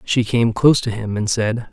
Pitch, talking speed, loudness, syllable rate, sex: 110 Hz, 245 wpm, -18 LUFS, 5.0 syllables/s, male